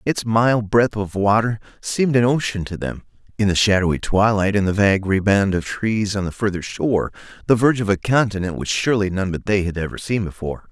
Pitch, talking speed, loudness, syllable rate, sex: 105 Hz, 215 wpm, -19 LUFS, 5.8 syllables/s, male